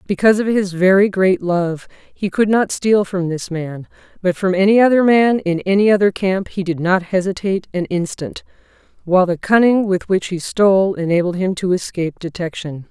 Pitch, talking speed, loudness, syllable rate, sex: 190 Hz, 185 wpm, -16 LUFS, 5.2 syllables/s, female